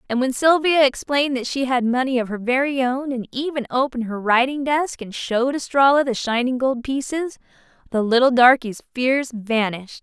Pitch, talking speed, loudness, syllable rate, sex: 255 Hz, 180 wpm, -20 LUFS, 5.3 syllables/s, female